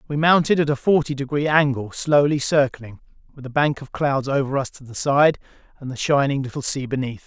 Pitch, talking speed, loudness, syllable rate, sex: 140 Hz, 205 wpm, -20 LUFS, 5.5 syllables/s, male